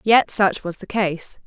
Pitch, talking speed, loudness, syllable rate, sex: 195 Hz, 205 wpm, -20 LUFS, 3.8 syllables/s, female